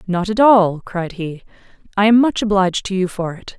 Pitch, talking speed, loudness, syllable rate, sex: 195 Hz, 220 wpm, -16 LUFS, 5.1 syllables/s, female